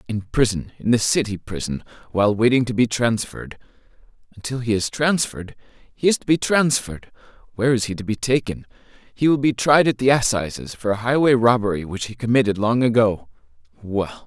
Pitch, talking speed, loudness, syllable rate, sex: 115 Hz, 180 wpm, -20 LUFS, 5.8 syllables/s, male